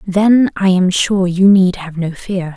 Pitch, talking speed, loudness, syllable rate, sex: 185 Hz, 210 wpm, -13 LUFS, 3.9 syllables/s, female